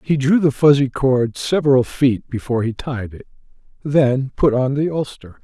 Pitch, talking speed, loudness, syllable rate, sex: 130 Hz, 175 wpm, -18 LUFS, 4.7 syllables/s, male